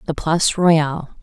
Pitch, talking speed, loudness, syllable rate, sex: 160 Hz, 145 wpm, -17 LUFS, 5.0 syllables/s, female